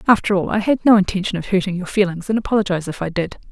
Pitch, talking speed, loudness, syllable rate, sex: 195 Hz, 255 wpm, -18 LUFS, 7.3 syllables/s, female